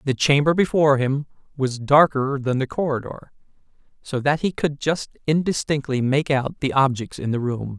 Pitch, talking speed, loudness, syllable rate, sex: 140 Hz, 170 wpm, -21 LUFS, 4.8 syllables/s, male